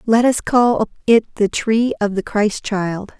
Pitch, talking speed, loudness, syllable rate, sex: 215 Hz, 190 wpm, -17 LUFS, 3.5 syllables/s, female